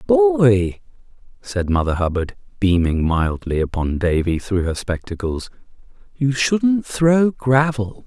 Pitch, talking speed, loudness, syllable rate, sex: 105 Hz, 110 wpm, -19 LUFS, 3.7 syllables/s, male